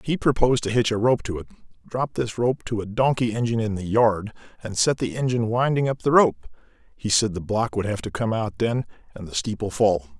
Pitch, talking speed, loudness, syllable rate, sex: 110 Hz, 235 wpm, -23 LUFS, 5.7 syllables/s, male